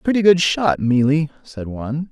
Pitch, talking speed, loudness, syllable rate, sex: 155 Hz, 200 wpm, -17 LUFS, 5.2 syllables/s, male